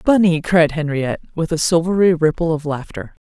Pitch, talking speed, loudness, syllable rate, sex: 165 Hz, 165 wpm, -17 LUFS, 5.4 syllables/s, female